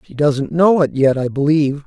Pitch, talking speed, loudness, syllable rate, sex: 145 Hz, 225 wpm, -15 LUFS, 5.2 syllables/s, male